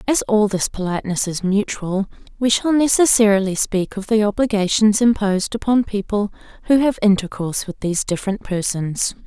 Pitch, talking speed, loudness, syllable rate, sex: 205 Hz, 150 wpm, -18 LUFS, 5.4 syllables/s, female